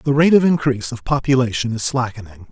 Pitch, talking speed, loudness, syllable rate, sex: 130 Hz, 190 wpm, -18 LUFS, 6.1 syllables/s, male